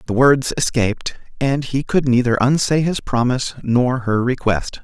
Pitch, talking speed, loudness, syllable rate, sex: 130 Hz, 160 wpm, -18 LUFS, 4.7 syllables/s, male